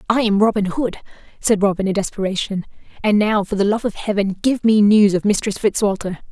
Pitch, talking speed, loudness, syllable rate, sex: 205 Hz, 200 wpm, -18 LUFS, 5.7 syllables/s, female